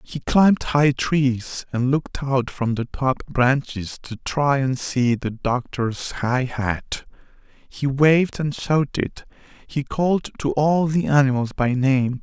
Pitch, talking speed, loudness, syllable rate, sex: 135 Hz, 150 wpm, -21 LUFS, 3.6 syllables/s, male